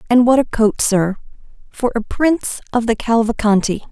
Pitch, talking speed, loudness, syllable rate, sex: 230 Hz, 170 wpm, -16 LUFS, 5.0 syllables/s, female